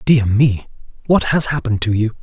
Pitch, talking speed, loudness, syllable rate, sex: 120 Hz, 190 wpm, -16 LUFS, 5.4 syllables/s, male